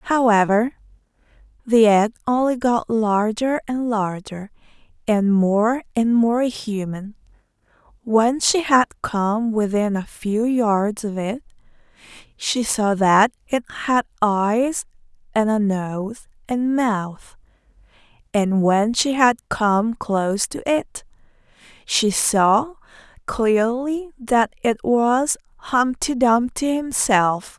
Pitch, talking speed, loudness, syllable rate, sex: 225 Hz, 110 wpm, -20 LUFS, 3.1 syllables/s, female